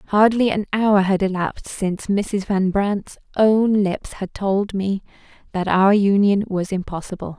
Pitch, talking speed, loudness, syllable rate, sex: 200 Hz, 155 wpm, -20 LUFS, 4.1 syllables/s, female